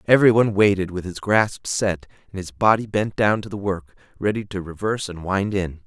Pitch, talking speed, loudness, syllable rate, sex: 100 Hz, 215 wpm, -21 LUFS, 5.5 syllables/s, male